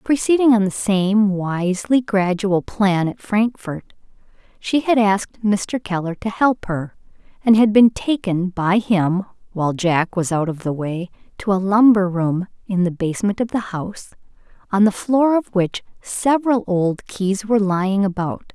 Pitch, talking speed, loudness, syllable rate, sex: 200 Hz, 165 wpm, -19 LUFS, 4.2 syllables/s, female